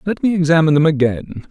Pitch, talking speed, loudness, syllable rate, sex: 155 Hz, 200 wpm, -15 LUFS, 6.6 syllables/s, male